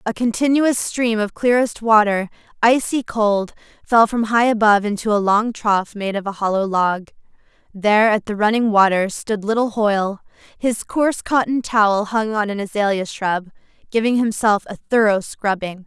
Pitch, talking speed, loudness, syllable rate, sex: 215 Hz, 165 wpm, -18 LUFS, 4.8 syllables/s, female